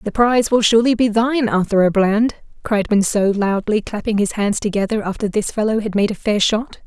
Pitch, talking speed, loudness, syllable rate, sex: 215 Hz, 210 wpm, -17 LUFS, 5.7 syllables/s, female